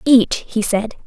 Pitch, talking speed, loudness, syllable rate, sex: 225 Hz, 170 wpm, -17 LUFS, 3.7 syllables/s, female